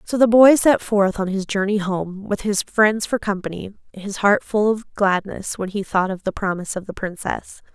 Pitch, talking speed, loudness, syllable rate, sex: 200 Hz, 215 wpm, -20 LUFS, 4.8 syllables/s, female